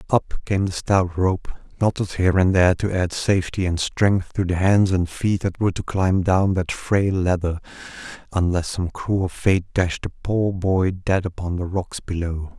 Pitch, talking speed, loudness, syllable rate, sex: 90 Hz, 190 wpm, -21 LUFS, 4.5 syllables/s, male